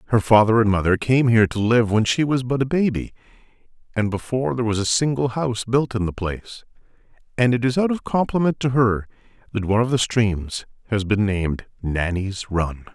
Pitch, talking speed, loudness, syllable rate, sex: 115 Hz, 200 wpm, -21 LUFS, 5.7 syllables/s, male